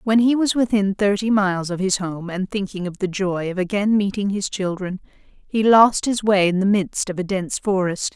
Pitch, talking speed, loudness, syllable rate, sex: 195 Hz, 220 wpm, -20 LUFS, 4.9 syllables/s, female